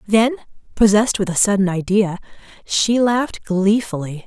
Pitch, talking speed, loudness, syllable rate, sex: 205 Hz, 125 wpm, -17 LUFS, 4.9 syllables/s, female